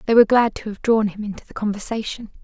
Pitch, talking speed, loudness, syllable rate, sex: 215 Hz, 245 wpm, -20 LUFS, 6.9 syllables/s, female